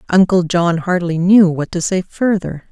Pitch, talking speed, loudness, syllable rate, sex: 180 Hz, 175 wpm, -15 LUFS, 4.5 syllables/s, female